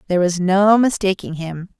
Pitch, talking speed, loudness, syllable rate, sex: 190 Hz, 165 wpm, -17 LUFS, 5.2 syllables/s, female